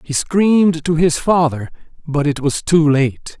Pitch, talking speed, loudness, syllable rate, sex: 155 Hz, 175 wpm, -15 LUFS, 4.1 syllables/s, male